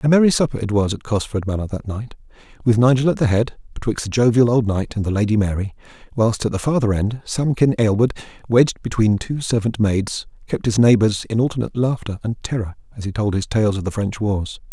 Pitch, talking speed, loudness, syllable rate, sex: 110 Hz, 215 wpm, -19 LUFS, 5.8 syllables/s, male